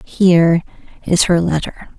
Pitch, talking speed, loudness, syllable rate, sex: 170 Hz, 120 wpm, -15 LUFS, 4.1 syllables/s, female